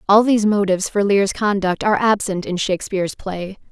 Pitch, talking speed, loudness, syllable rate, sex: 200 Hz, 180 wpm, -18 LUFS, 5.8 syllables/s, female